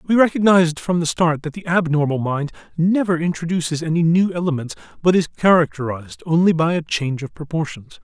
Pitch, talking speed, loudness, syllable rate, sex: 165 Hz, 170 wpm, -19 LUFS, 5.9 syllables/s, male